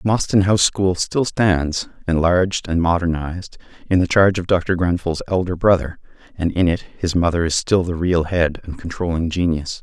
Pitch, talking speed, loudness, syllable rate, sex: 90 Hz, 175 wpm, -19 LUFS, 5.0 syllables/s, male